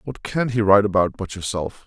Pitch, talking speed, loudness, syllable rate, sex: 105 Hz, 225 wpm, -20 LUFS, 6.0 syllables/s, male